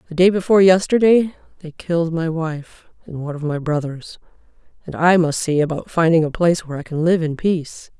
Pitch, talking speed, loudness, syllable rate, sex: 165 Hz, 205 wpm, -18 LUFS, 5.9 syllables/s, female